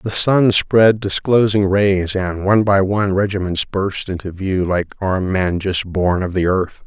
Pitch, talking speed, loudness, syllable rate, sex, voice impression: 95 Hz, 185 wpm, -16 LUFS, 4.4 syllables/s, male, masculine, middle-aged, powerful, slightly dark, muffled, slightly raspy, cool, calm, mature, reassuring, wild, kind